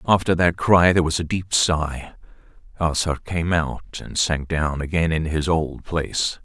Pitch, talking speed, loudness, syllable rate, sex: 80 Hz, 175 wpm, -21 LUFS, 4.3 syllables/s, male